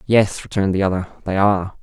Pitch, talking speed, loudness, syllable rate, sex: 100 Hz, 200 wpm, -19 LUFS, 6.7 syllables/s, male